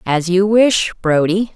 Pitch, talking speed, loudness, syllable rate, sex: 190 Hz, 155 wpm, -14 LUFS, 3.8 syllables/s, female